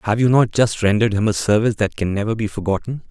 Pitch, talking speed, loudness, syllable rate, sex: 105 Hz, 250 wpm, -18 LUFS, 6.8 syllables/s, male